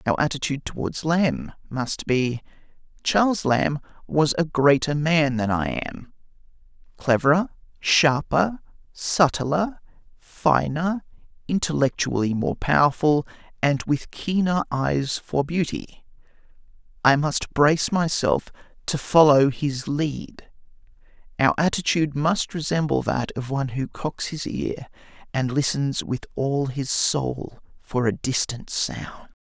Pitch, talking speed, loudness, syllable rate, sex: 145 Hz, 115 wpm, -23 LUFS, 3.9 syllables/s, male